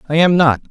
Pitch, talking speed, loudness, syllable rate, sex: 155 Hz, 255 wpm, -13 LUFS, 6.5 syllables/s, male